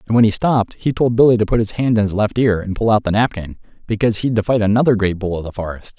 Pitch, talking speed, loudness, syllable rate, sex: 110 Hz, 300 wpm, -17 LUFS, 6.9 syllables/s, male